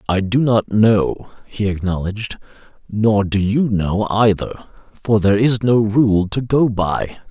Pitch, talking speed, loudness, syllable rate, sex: 105 Hz, 155 wpm, -17 LUFS, 4.0 syllables/s, male